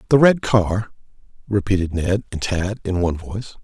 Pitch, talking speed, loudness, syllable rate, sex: 100 Hz, 165 wpm, -20 LUFS, 5.2 syllables/s, male